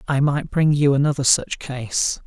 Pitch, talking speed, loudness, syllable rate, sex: 140 Hz, 185 wpm, -19 LUFS, 4.3 syllables/s, male